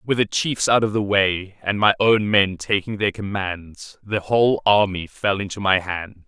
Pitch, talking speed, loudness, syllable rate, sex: 100 Hz, 200 wpm, -20 LUFS, 4.3 syllables/s, male